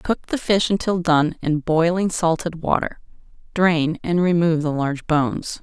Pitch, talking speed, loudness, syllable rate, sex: 165 Hz, 160 wpm, -20 LUFS, 4.6 syllables/s, female